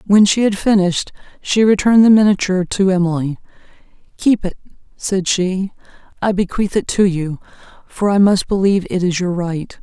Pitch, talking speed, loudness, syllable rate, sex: 190 Hz, 165 wpm, -16 LUFS, 5.3 syllables/s, female